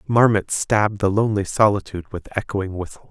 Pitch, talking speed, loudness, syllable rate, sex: 100 Hz, 155 wpm, -20 LUFS, 5.7 syllables/s, male